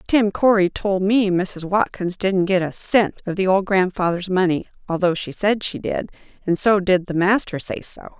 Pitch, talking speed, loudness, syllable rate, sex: 190 Hz, 200 wpm, -20 LUFS, 4.6 syllables/s, female